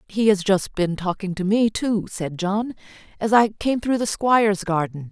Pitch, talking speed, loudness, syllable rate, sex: 205 Hz, 200 wpm, -21 LUFS, 4.5 syllables/s, female